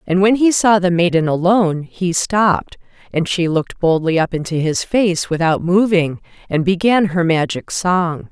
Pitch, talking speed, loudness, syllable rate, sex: 180 Hz, 175 wpm, -16 LUFS, 4.6 syllables/s, female